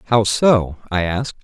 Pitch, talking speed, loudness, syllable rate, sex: 105 Hz, 165 wpm, -17 LUFS, 4.9 syllables/s, male